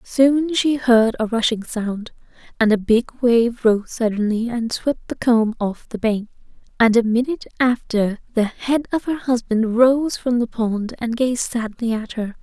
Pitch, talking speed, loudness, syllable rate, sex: 235 Hz, 180 wpm, -19 LUFS, 4.1 syllables/s, female